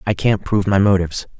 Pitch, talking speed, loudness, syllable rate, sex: 95 Hz, 215 wpm, -17 LUFS, 6.7 syllables/s, male